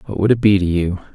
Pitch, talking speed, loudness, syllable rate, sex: 95 Hz, 315 wpm, -16 LUFS, 6.7 syllables/s, male